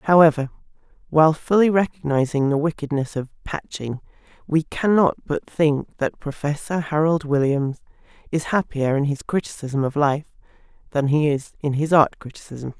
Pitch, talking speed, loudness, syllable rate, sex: 150 Hz, 140 wpm, -21 LUFS, 5.0 syllables/s, female